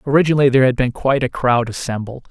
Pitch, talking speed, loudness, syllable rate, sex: 130 Hz, 210 wpm, -17 LUFS, 7.4 syllables/s, male